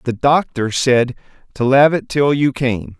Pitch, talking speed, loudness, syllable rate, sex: 130 Hz, 180 wpm, -16 LUFS, 4.0 syllables/s, male